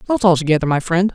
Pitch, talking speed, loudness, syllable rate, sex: 175 Hz, 210 wpm, -16 LUFS, 7.2 syllables/s, female